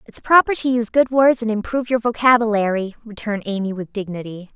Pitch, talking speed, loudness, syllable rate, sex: 225 Hz, 185 wpm, -18 LUFS, 6.3 syllables/s, female